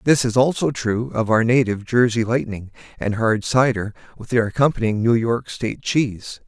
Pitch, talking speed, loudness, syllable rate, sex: 115 Hz, 175 wpm, -20 LUFS, 5.2 syllables/s, male